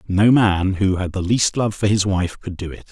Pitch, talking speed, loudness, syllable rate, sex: 100 Hz, 270 wpm, -19 LUFS, 4.8 syllables/s, male